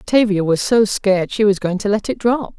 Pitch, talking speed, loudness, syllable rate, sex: 205 Hz, 255 wpm, -17 LUFS, 5.1 syllables/s, female